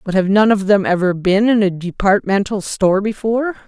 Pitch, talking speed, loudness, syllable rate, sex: 200 Hz, 195 wpm, -16 LUFS, 5.5 syllables/s, female